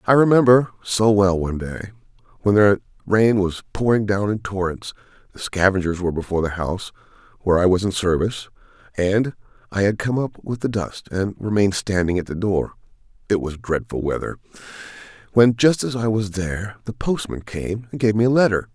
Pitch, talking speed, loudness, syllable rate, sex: 105 Hz, 175 wpm, -20 LUFS, 5.7 syllables/s, male